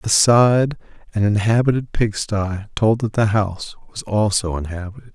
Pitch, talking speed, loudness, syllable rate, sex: 105 Hz, 165 wpm, -19 LUFS, 4.9 syllables/s, male